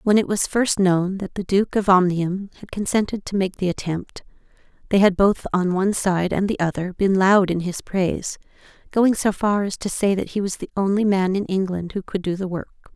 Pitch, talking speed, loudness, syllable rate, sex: 190 Hz, 225 wpm, -21 LUFS, 5.2 syllables/s, female